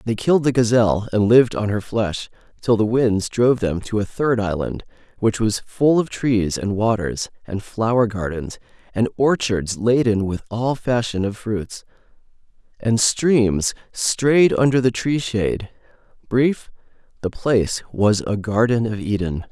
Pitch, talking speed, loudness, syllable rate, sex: 110 Hz, 155 wpm, -20 LUFS, 4.3 syllables/s, male